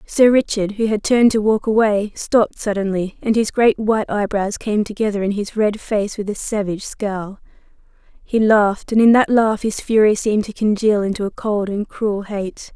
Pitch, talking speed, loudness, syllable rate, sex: 210 Hz, 200 wpm, -18 LUFS, 5.0 syllables/s, female